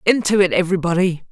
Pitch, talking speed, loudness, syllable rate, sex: 180 Hz, 135 wpm, -17 LUFS, 7.1 syllables/s, male